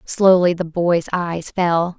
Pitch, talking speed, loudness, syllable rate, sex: 175 Hz, 150 wpm, -18 LUFS, 3.2 syllables/s, female